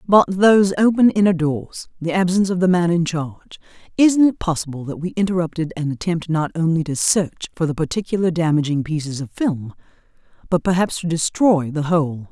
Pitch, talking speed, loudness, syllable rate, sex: 170 Hz, 175 wpm, -19 LUFS, 5.6 syllables/s, female